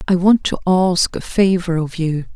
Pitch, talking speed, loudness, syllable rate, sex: 175 Hz, 205 wpm, -17 LUFS, 4.4 syllables/s, female